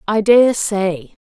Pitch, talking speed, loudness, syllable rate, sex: 200 Hz, 145 wpm, -15 LUFS, 2.9 syllables/s, female